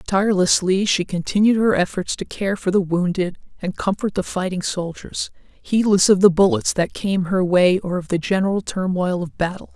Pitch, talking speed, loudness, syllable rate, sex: 190 Hz, 185 wpm, -19 LUFS, 5.0 syllables/s, female